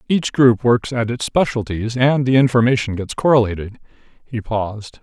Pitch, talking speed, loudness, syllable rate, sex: 120 Hz, 155 wpm, -17 LUFS, 5.1 syllables/s, male